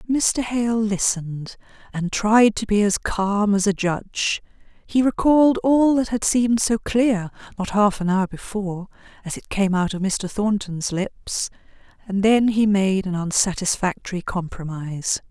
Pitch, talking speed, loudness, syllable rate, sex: 205 Hz, 155 wpm, -21 LUFS, 4.4 syllables/s, female